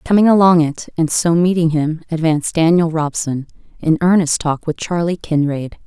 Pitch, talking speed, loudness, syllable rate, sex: 165 Hz, 165 wpm, -16 LUFS, 4.9 syllables/s, female